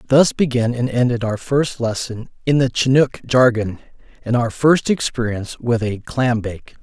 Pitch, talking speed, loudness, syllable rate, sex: 120 Hz, 165 wpm, -18 LUFS, 4.6 syllables/s, male